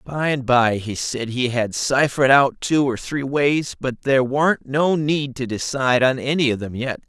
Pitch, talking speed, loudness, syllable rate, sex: 130 Hz, 210 wpm, -20 LUFS, 4.5 syllables/s, male